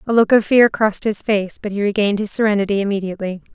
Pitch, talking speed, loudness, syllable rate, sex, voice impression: 205 Hz, 220 wpm, -17 LUFS, 7.0 syllables/s, female, very feminine, young, very thin, tensed, slightly powerful, bright, slightly soft, very clear, very fluent, raspy, very cute, intellectual, very refreshing, sincere, slightly calm, very friendly, reassuring, very unique, elegant, wild, very sweet, very lively, slightly strict, intense, slightly sharp, very light